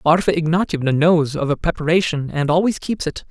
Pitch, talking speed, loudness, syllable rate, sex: 160 Hz, 180 wpm, -18 LUFS, 5.6 syllables/s, male